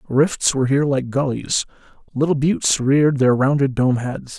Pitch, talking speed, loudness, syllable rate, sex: 135 Hz, 165 wpm, -18 LUFS, 5.1 syllables/s, male